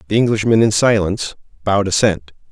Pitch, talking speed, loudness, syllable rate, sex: 100 Hz, 145 wpm, -16 LUFS, 6.4 syllables/s, male